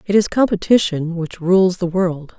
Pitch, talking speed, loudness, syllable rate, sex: 180 Hz, 175 wpm, -17 LUFS, 4.4 syllables/s, female